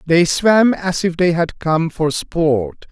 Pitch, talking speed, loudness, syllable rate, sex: 165 Hz, 185 wpm, -16 LUFS, 3.2 syllables/s, male